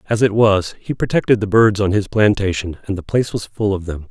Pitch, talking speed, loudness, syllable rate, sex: 100 Hz, 250 wpm, -17 LUFS, 5.6 syllables/s, male